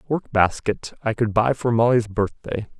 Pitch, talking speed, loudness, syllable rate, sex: 115 Hz, 150 wpm, -21 LUFS, 4.5 syllables/s, male